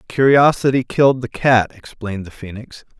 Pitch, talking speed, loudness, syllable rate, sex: 120 Hz, 140 wpm, -16 LUFS, 5.2 syllables/s, male